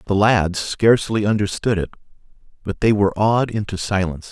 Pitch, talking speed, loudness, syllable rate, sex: 100 Hz, 155 wpm, -19 LUFS, 5.6 syllables/s, male